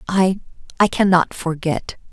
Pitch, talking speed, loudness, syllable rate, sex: 180 Hz, 85 wpm, -19 LUFS, 4.1 syllables/s, female